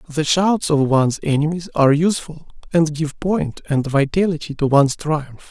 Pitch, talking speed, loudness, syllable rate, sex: 155 Hz, 165 wpm, -18 LUFS, 4.9 syllables/s, male